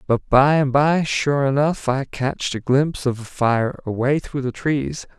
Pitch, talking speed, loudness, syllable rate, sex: 135 Hz, 185 wpm, -20 LUFS, 4.1 syllables/s, male